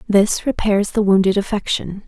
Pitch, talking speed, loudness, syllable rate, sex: 200 Hz, 145 wpm, -17 LUFS, 4.7 syllables/s, female